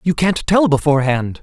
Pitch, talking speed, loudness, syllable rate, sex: 160 Hz, 170 wpm, -15 LUFS, 5.3 syllables/s, male